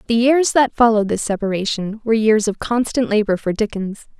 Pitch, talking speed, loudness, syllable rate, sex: 220 Hz, 185 wpm, -18 LUFS, 5.6 syllables/s, female